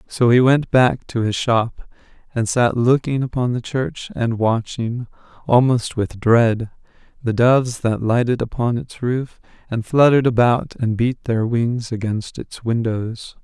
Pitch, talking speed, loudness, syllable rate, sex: 120 Hz, 155 wpm, -19 LUFS, 4.1 syllables/s, male